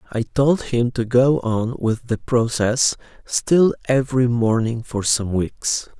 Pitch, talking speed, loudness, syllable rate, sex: 120 Hz, 150 wpm, -19 LUFS, 3.6 syllables/s, male